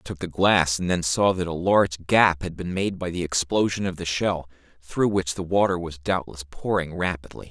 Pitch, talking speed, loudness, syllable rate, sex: 90 Hz, 225 wpm, -23 LUFS, 5.2 syllables/s, male